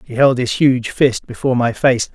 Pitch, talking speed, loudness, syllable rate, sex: 125 Hz, 225 wpm, -16 LUFS, 4.9 syllables/s, male